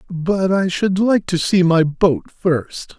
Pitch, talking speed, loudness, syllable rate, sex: 180 Hz, 180 wpm, -17 LUFS, 3.2 syllables/s, male